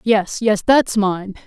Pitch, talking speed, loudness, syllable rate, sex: 210 Hz, 165 wpm, -17 LUFS, 3.3 syllables/s, female